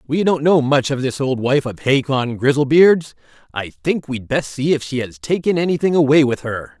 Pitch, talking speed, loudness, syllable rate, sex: 140 Hz, 210 wpm, -17 LUFS, 5.1 syllables/s, male